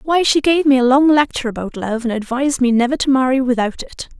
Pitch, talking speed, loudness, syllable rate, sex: 260 Hz, 245 wpm, -16 LUFS, 6.2 syllables/s, female